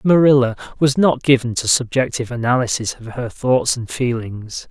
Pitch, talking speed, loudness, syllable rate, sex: 125 Hz, 155 wpm, -18 LUFS, 5.0 syllables/s, male